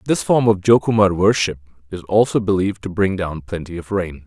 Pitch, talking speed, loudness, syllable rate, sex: 95 Hz, 195 wpm, -18 LUFS, 5.9 syllables/s, male